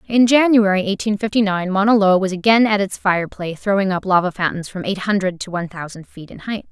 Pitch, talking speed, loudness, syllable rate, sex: 195 Hz, 230 wpm, -17 LUFS, 5.8 syllables/s, female